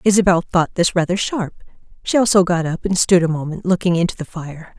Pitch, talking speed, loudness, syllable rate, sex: 180 Hz, 215 wpm, -17 LUFS, 5.9 syllables/s, female